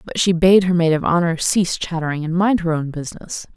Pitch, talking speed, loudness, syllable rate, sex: 170 Hz, 235 wpm, -18 LUFS, 5.9 syllables/s, female